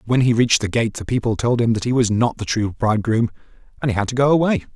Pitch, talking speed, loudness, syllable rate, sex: 115 Hz, 290 wpm, -19 LUFS, 6.9 syllables/s, male